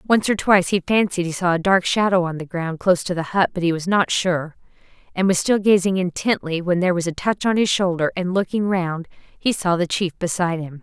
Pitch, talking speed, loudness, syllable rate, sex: 180 Hz, 245 wpm, -20 LUFS, 5.6 syllables/s, female